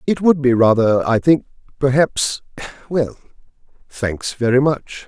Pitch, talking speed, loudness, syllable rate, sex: 130 Hz, 105 wpm, -17 LUFS, 4.2 syllables/s, male